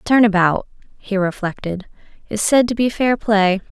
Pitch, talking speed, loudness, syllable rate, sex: 210 Hz, 160 wpm, -18 LUFS, 4.6 syllables/s, female